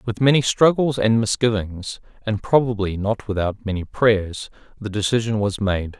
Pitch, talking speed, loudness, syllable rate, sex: 110 Hz, 150 wpm, -20 LUFS, 4.6 syllables/s, male